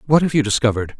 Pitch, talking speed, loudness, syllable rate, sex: 125 Hz, 240 wpm, -17 LUFS, 8.2 syllables/s, male